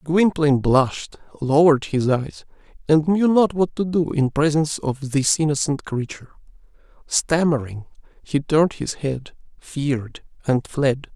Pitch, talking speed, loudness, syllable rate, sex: 150 Hz, 135 wpm, -20 LUFS, 4.6 syllables/s, male